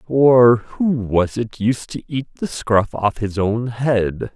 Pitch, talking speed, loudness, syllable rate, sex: 115 Hz, 180 wpm, -18 LUFS, 3.2 syllables/s, male